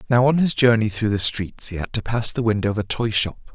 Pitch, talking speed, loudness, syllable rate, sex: 110 Hz, 290 wpm, -21 LUFS, 5.7 syllables/s, male